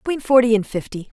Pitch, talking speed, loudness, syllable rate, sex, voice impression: 230 Hz, 200 wpm, -18 LUFS, 6.4 syllables/s, female, feminine, adult-like, tensed, powerful, clear, fluent, slightly raspy, intellectual, calm, slightly reassuring, elegant, lively, slightly sharp